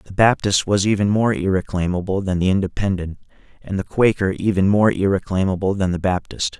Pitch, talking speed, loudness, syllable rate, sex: 95 Hz, 165 wpm, -19 LUFS, 5.5 syllables/s, male